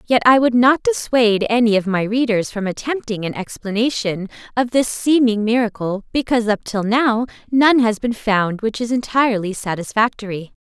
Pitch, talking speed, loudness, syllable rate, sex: 225 Hz, 165 wpm, -18 LUFS, 5.2 syllables/s, female